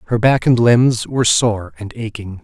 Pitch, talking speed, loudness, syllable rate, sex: 110 Hz, 195 wpm, -15 LUFS, 4.7 syllables/s, male